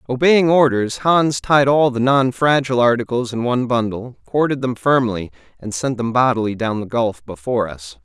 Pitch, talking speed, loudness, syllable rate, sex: 125 Hz, 180 wpm, -17 LUFS, 5.1 syllables/s, male